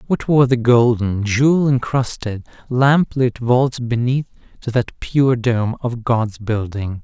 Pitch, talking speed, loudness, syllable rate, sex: 120 Hz, 145 wpm, -17 LUFS, 3.8 syllables/s, male